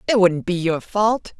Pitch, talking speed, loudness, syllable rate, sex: 190 Hz, 215 wpm, -20 LUFS, 4.2 syllables/s, female